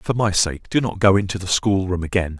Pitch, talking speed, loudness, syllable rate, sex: 95 Hz, 250 wpm, -20 LUFS, 5.5 syllables/s, male